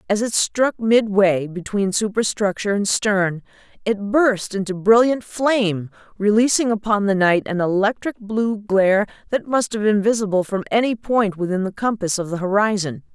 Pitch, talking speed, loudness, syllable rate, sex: 205 Hz, 160 wpm, -19 LUFS, 4.8 syllables/s, female